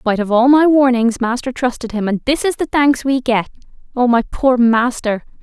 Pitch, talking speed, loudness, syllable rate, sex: 245 Hz, 210 wpm, -15 LUFS, 5.0 syllables/s, female